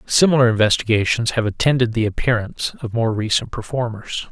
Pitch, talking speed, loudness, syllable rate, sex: 115 Hz, 140 wpm, -19 LUFS, 5.8 syllables/s, male